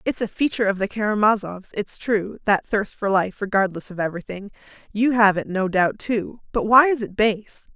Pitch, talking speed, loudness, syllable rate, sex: 210 Hz, 200 wpm, -21 LUFS, 5.3 syllables/s, female